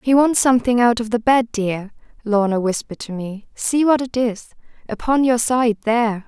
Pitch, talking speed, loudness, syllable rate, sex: 230 Hz, 190 wpm, -18 LUFS, 5.1 syllables/s, female